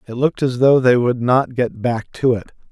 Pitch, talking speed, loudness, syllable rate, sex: 125 Hz, 245 wpm, -17 LUFS, 5.0 syllables/s, male